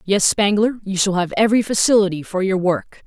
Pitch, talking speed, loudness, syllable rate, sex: 200 Hz, 195 wpm, -18 LUFS, 5.5 syllables/s, female